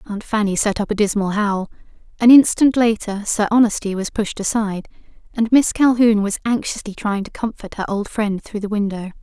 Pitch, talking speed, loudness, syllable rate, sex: 210 Hz, 190 wpm, -18 LUFS, 5.4 syllables/s, female